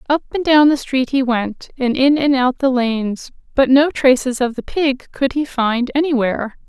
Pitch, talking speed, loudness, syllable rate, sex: 265 Hz, 205 wpm, -16 LUFS, 4.7 syllables/s, female